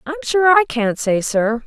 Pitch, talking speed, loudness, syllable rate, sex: 280 Hz, 215 wpm, -16 LUFS, 4.2 syllables/s, female